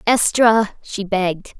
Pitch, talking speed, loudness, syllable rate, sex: 205 Hz, 115 wpm, -17 LUFS, 3.7 syllables/s, female